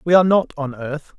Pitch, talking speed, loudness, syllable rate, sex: 155 Hz, 255 wpm, -19 LUFS, 5.9 syllables/s, male